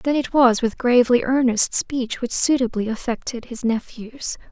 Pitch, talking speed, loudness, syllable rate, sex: 245 Hz, 160 wpm, -20 LUFS, 4.6 syllables/s, female